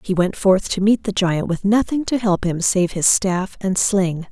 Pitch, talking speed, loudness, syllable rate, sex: 195 Hz, 235 wpm, -18 LUFS, 4.3 syllables/s, female